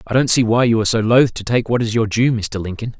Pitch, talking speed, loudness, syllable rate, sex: 115 Hz, 320 wpm, -16 LUFS, 6.3 syllables/s, male